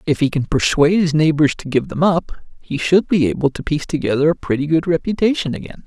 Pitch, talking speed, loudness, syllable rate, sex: 160 Hz, 225 wpm, -17 LUFS, 6.1 syllables/s, male